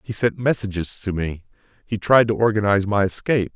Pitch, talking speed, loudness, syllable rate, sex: 105 Hz, 185 wpm, -20 LUFS, 6.0 syllables/s, male